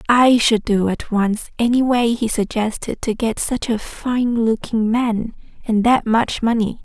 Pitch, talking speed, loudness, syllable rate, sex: 225 Hz, 175 wpm, -18 LUFS, 4.0 syllables/s, female